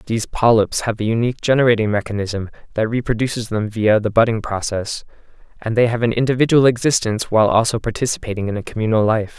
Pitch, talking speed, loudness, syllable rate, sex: 110 Hz, 175 wpm, -18 LUFS, 6.4 syllables/s, male